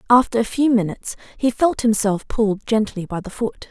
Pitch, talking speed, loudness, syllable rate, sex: 225 Hz, 195 wpm, -20 LUFS, 5.4 syllables/s, female